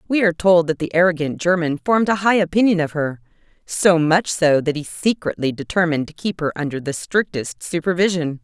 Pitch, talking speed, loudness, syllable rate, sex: 170 Hz, 185 wpm, -19 LUFS, 5.7 syllables/s, female